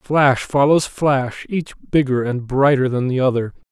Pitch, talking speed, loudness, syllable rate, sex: 135 Hz, 160 wpm, -18 LUFS, 4.2 syllables/s, male